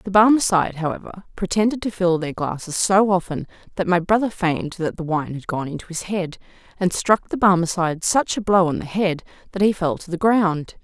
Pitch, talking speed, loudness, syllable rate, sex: 185 Hz, 210 wpm, -20 LUFS, 5.5 syllables/s, female